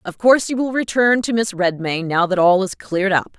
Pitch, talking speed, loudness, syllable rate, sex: 200 Hz, 250 wpm, -17 LUFS, 5.5 syllables/s, female